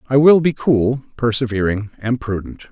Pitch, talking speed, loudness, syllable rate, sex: 120 Hz, 155 wpm, -17 LUFS, 4.6 syllables/s, male